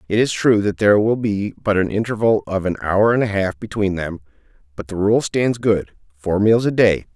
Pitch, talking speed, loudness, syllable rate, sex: 100 Hz, 220 wpm, -18 LUFS, 5.1 syllables/s, male